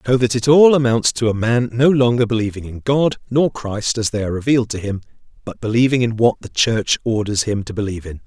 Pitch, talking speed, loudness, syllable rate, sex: 115 Hz, 230 wpm, -17 LUFS, 5.9 syllables/s, male